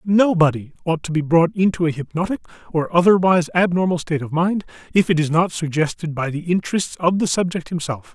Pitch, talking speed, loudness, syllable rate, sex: 170 Hz, 190 wpm, -19 LUFS, 5.9 syllables/s, male